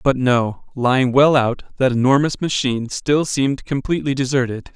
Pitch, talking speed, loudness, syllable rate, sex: 130 Hz, 150 wpm, -18 LUFS, 5.2 syllables/s, male